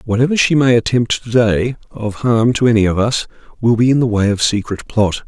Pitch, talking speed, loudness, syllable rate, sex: 115 Hz, 230 wpm, -15 LUFS, 5.4 syllables/s, male